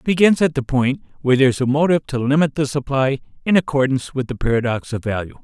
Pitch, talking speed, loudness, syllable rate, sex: 135 Hz, 230 wpm, -19 LUFS, 6.9 syllables/s, male